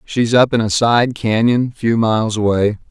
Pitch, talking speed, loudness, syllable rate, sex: 115 Hz, 185 wpm, -15 LUFS, 4.4 syllables/s, male